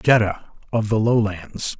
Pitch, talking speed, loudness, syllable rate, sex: 110 Hz, 135 wpm, -21 LUFS, 4.1 syllables/s, male